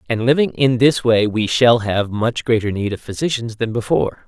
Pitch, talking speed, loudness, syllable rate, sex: 115 Hz, 210 wpm, -17 LUFS, 5.2 syllables/s, male